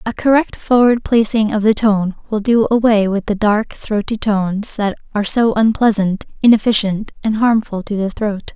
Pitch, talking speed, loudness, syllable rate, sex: 215 Hz, 175 wpm, -15 LUFS, 4.9 syllables/s, female